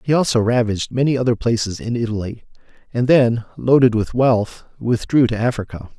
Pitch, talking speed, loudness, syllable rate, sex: 120 Hz, 160 wpm, -18 LUFS, 5.5 syllables/s, male